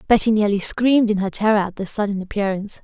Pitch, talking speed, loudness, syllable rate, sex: 210 Hz, 210 wpm, -19 LUFS, 6.7 syllables/s, female